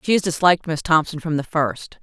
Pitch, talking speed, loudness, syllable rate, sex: 160 Hz, 235 wpm, -20 LUFS, 5.8 syllables/s, female